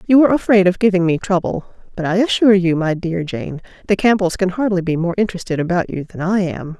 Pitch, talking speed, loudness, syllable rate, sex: 185 Hz, 230 wpm, -17 LUFS, 6.3 syllables/s, female